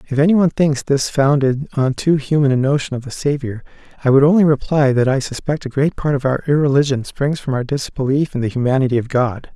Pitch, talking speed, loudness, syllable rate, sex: 140 Hz, 225 wpm, -17 LUFS, 6.0 syllables/s, male